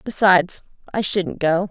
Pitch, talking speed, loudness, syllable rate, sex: 185 Hz, 140 wpm, -19 LUFS, 4.7 syllables/s, female